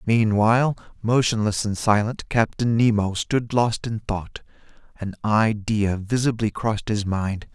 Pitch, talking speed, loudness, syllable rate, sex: 110 Hz, 125 wpm, -22 LUFS, 4.1 syllables/s, male